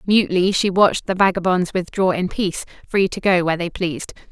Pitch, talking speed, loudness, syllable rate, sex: 185 Hz, 195 wpm, -19 LUFS, 6.1 syllables/s, female